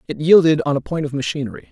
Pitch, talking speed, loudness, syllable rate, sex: 150 Hz, 245 wpm, -17 LUFS, 7.1 syllables/s, male